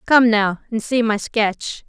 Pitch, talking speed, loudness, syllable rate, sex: 225 Hz, 190 wpm, -18 LUFS, 3.7 syllables/s, female